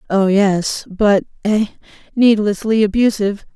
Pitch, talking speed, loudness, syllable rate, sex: 205 Hz, 70 wpm, -16 LUFS, 4.3 syllables/s, female